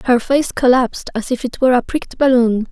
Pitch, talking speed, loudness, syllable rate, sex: 250 Hz, 220 wpm, -16 LUFS, 6.0 syllables/s, female